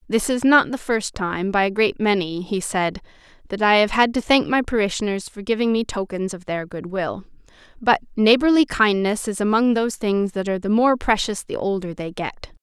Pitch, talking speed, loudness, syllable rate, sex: 210 Hz, 205 wpm, -20 LUFS, 5.4 syllables/s, female